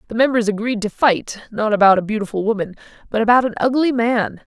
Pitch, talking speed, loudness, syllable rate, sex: 220 Hz, 200 wpm, -18 LUFS, 6.1 syllables/s, female